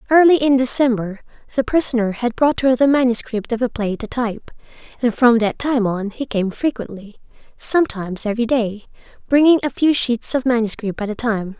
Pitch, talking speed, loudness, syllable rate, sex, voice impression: 240 Hz, 180 wpm, -18 LUFS, 5.5 syllables/s, female, feminine, slightly young, tensed, slightly bright, clear, fluent, slightly cute, unique, lively, slightly strict, sharp, slightly light